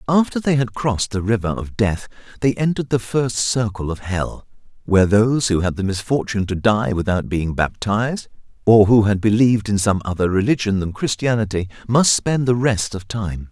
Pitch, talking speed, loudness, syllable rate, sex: 110 Hz, 185 wpm, -19 LUFS, 5.3 syllables/s, male